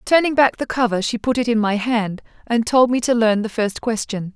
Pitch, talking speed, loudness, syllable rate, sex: 230 Hz, 250 wpm, -19 LUFS, 5.2 syllables/s, female